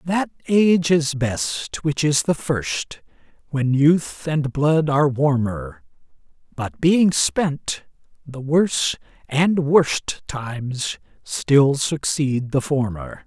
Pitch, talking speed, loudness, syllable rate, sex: 150 Hz, 120 wpm, -20 LUFS, 3.0 syllables/s, male